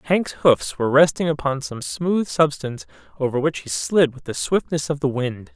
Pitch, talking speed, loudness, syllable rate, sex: 135 Hz, 195 wpm, -21 LUFS, 5.0 syllables/s, male